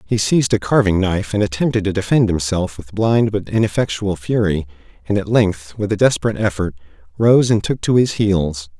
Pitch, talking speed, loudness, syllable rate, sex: 100 Hz, 190 wpm, -17 LUFS, 5.5 syllables/s, male